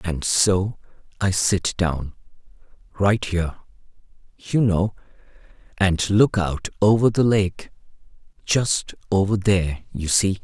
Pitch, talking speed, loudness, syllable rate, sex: 95 Hz, 100 wpm, -21 LUFS, 3.8 syllables/s, male